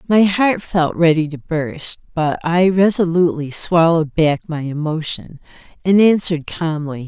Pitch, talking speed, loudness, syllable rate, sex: 165 Hz, 135 wpm, -17 LUFS, 4.5 syllables/s, female